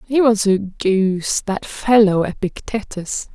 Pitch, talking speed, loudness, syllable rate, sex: 205 Hz, 125 wpm, -18 LUFS, 3.8 syllables/s, female